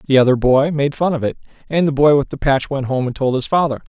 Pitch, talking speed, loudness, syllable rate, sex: 140 Hz, 290 wpm, -17 LUFS, 6.3 syllables/s, male